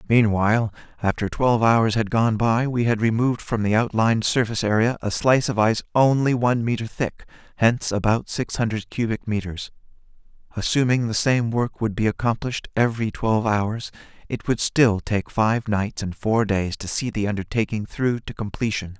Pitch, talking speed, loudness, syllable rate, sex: 110 Hz, 175 wpm, -22 LUFS, 5.3 syllables/s, male